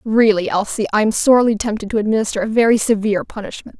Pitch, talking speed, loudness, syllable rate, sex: 215 Hz, 190 wpm, -16 LUFS, 6.8 syllables/s, female